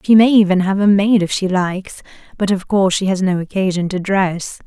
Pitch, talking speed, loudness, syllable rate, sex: 190 Hz, 230 wpm, -16 LUFS, 5.5 syllables/s, female